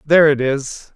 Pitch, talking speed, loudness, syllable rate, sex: 145 Hz, 190 wpm, -16 LUFS, 4.7 syllables/s, male